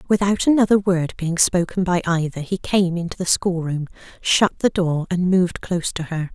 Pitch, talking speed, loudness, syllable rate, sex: 180 Hz, 190 wpm, -20 LUFS, 5.1 syllables/s, female